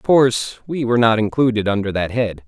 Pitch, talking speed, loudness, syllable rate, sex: 115 Hz, 220 wpm, -18 LUFS, 6.0 syllables/s, male